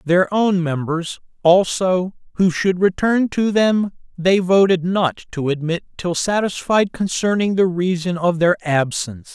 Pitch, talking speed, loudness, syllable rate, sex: 180 Hz, 140 wpm, -18 LUFS, 4.1 syllables/s, male